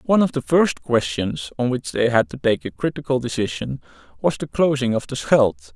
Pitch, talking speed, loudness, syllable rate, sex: 125 Hz, 210 wpm, -21 LUFS, 5.3 syllables/s, male